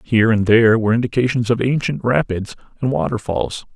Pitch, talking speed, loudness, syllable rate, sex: 115 Hz, 160 wpm, -17 LUFS, 6.0 syllables/s, male